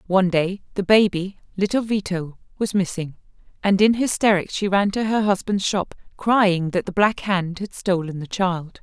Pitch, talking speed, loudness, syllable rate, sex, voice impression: 190 Hz, 175 wpm, -21 LUFS, 4.7 syllables/s, female, feminine, middle-aged, tensed, powerful, clear, fluent, calm, friendly, reassuring, elegant, lively, slightly strict, slightly intense